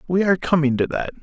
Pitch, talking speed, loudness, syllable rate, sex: 160 Hz, 245 wpm, -20 LUFS, 7.3 syllables/s, male